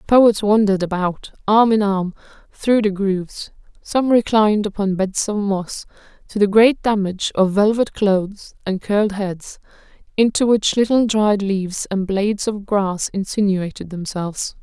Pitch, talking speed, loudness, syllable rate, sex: 205 Hz, 150 wpm, -18 LUFS, 4.7 syllables/s, female